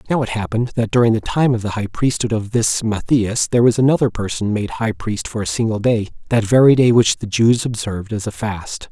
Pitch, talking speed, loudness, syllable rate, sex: 110 Hz, 235 wpm, -17 LUFS, 5.5 syllables/s, male